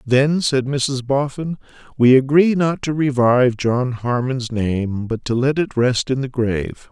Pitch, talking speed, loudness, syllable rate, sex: 130 Hz, 175 wpm, -18 LUFS, 4.1 syllables/s, male